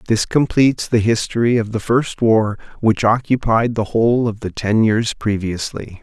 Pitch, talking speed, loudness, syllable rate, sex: 110 Hz, 170 wpm, -17 LUFS, 4.6 syllables/s, male